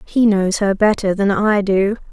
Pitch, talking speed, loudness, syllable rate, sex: 200 Hz, 200 wpm, -16 LUFS, 4.2 syllables/s, female